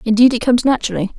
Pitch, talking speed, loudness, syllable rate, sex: 235 Hz, 205 wpm, -15 LUFS, 8.8 syllables/s, female